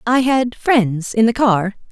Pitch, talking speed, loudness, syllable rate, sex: 230 Hz, 190 wpm, -16 LUFS, 3.6 syllables/s, female